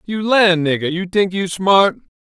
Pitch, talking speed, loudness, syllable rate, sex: 185 Hz, 190 wpm, -16 LUFS, 4.4 syllables/s, male